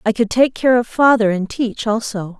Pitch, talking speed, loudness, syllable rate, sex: 225 Hz, 225 wpm, -16 LUFS, 4.8 syllables/s, female